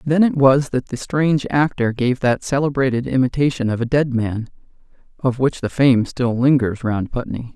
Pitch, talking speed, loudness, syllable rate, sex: 130 Hz, 185 wpm, -18 LUFS, 4.9 syllables/s, male